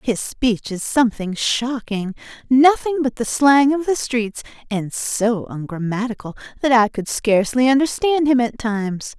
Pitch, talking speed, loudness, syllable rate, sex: 240 Hz, 150 wpm, -19 LUFS, 4.4 syllables/s, female